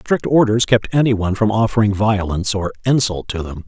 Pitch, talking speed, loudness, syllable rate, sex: 105 Hz, 180 wpm, -17 LUFS, 5.5 syllables/s, male